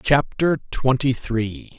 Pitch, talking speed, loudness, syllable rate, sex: 125 Hz, 100 wpm, -21 LUFS, 3.2 syllables/s, male